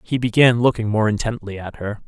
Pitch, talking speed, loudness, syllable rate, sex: 110 Hz, 200 wpm, -19 LUFS, 5.6 syllables/s, male